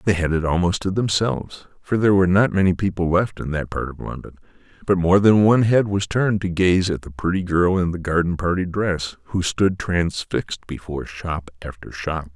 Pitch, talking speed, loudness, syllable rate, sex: 90 Hz, 210 wpm, -20 LUFS, 5.4 syllables/s, male